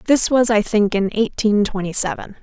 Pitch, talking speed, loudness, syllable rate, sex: 215 Hz, 200 wpm, -18 LUFS, 5.1 syllables/s, female